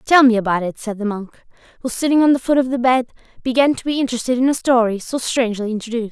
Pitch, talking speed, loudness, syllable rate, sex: 240 Hz, 245 wpm, -18 LUFS, 6.9 syllables/s, female